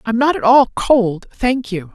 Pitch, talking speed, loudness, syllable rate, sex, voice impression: 230 Hz, 245 wpm, -15 LUFS, 4.7 syllables/s, female, masculine, slightly gender-neutral, adult-like, thick, tensed, slightly weak, slightly dark, slightly hard, slightly clear, slightly halting, cool, very intellectual, refreshing, very sincere, calm, slightly friendly, slightly reassuring, very unique, elegant, wild, slightly sweet, lively, strict, slightly intense, slightly sharp